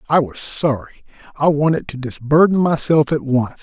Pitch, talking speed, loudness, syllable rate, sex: 145 Hz, 165 wpm, -17 LUFS, 5.1 syllables/s, male